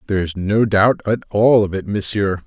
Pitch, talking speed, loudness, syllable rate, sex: 100 Hz, 220 wpm, -17 LUFS, 4.9 syllables/s, male